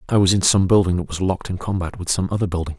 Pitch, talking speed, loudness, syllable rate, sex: 90 Hz, 300 wpm, -20 LUFS, 7.4 syllables/s, male